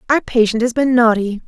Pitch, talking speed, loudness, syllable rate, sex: 240 Hz, 205 wpm, -15 LUFS, 5.6 syllables/s, female